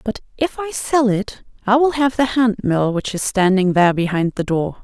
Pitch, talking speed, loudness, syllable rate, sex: 215 Hz, 225 wpm, -18 LUFS, 5.0 syllables/s, female